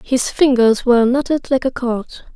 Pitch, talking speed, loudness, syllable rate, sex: 250 Hz, 180 wpm, -16 LUFS, 5.0 syllables/s, female